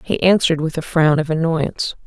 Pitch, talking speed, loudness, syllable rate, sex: 160 Hz, 205 wpm, -17 LUFS, 5.8 syllables/s, female